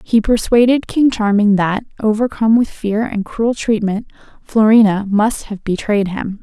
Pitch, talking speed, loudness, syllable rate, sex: 215 Hz, 150 wpm, -15 LUFS, 4.5 syllables/s, female